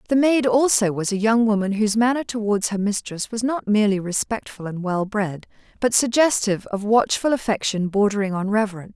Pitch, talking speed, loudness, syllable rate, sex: 215 Hz, 180 wpm, -21 LUFS, 5.7 syllables/s, female